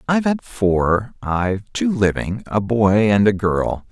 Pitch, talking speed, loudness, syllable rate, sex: 110 Hz, 155 wpm, -19 LUFS, 3.9 syllables/s, male